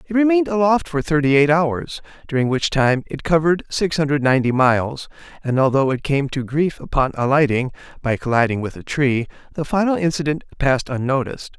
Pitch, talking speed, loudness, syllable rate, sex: 145 Hz, 175 wpm, -19 LUFS, 5.8 syllables/s, male